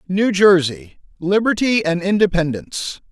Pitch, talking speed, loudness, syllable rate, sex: 185 Hz, 75 wpm, -17 LUFS, 4.5 syllables/s, male